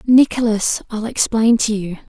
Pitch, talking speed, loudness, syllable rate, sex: 220 Hz, 140 wpm, -17 LUFS, 4.4 syllables/s, female